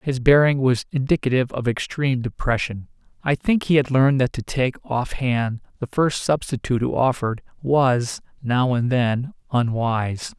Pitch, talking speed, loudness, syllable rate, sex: 130 Hz, 155 wpm, -21 LUFS, 4.9 syllables/s, male